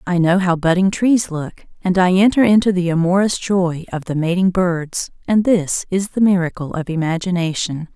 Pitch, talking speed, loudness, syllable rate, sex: 180 Hz, 180 wpm, -17 LUFS, 4.9 syllables/s, female